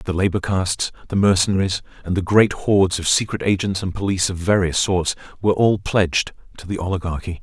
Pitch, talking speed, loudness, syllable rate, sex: 95 Hz, 185 wpm, -20 LUFS, 6.0 syllables/s, male